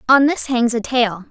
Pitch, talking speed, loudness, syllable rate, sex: 245 Hz, 230 wpm, -17 LUFS, 4.6 syllables/s, female